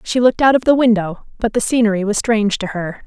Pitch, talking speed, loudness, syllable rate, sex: 220 Hz, 255 wpm, -16 LUFS, 6.3 syllables/s, female